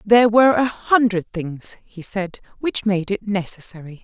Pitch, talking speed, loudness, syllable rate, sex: 205 Hz, 165 wpm, -19 LUFS, 4.6 syllables/s, female